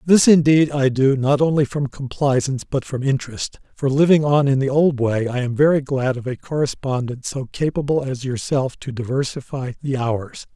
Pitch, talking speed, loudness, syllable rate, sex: 135 Hz, 190 wpm, -19 LUFS, 5.0 syllables/s, male